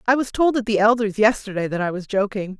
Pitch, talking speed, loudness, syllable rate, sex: 215 Hz, 255 wpm, -20 LUFS, 6.1 syllables/s, female